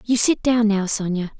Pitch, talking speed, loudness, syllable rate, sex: 215 Hz, 215 wpm, -19 LUFS, 4.8 syllables/s, female